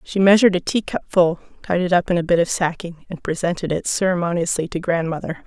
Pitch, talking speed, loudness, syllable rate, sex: 175 Hz, 210 wpm, -19 LUFS, 6.1 syllables/s, female